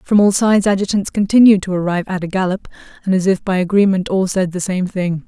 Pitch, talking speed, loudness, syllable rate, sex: 190 Hz, 230 wpm, -16 LUFS, 6.3 syllables/s, female